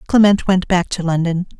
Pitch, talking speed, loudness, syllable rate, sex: 180 Hz, 190 wpm, -16 LUFS, 5.2 syllables/s, female